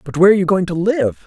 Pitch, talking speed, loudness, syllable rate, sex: 175 Hz, 330 wpm, -15 LUFS, 7.7 syllables/s, male